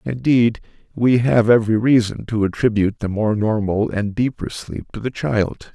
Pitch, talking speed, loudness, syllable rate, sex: 110 Hz, 165 wpm, -19 LUFS, 4.8 syllables/s, male